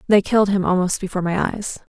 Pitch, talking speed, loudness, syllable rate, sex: 195 Hz, 215 wpm, -20 LUFS, 6.6 syllables/s, female